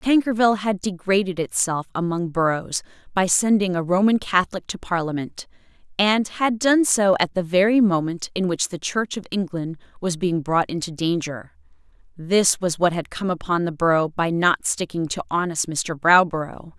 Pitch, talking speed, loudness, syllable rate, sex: 180 Hz, 170 wpm, -21 LUFS, 4.8 syllables/s, female